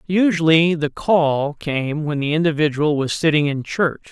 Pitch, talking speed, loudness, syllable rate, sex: 155 Hz, 160 wpm, -18 LUFS, 4.3 syllables/s, male